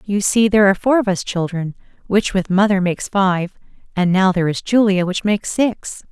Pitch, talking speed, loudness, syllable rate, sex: 195 Hz, 205 wpm, -17 LUFS, 5.5 syllables/s, female